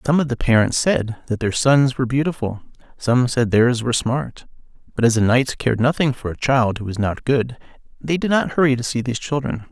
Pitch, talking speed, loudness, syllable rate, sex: 125 Hz, 220 wpm, -19 LUFS, 5.6 syllables/s, male